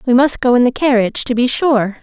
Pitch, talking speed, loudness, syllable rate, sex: 245 Hz, 265 wpm, -14 LUFS, 5.9 syllables/s, female